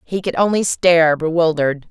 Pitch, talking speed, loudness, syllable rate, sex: 170 Hz, 160 wpm, -16 LUFS, 5.6 syllables/s, female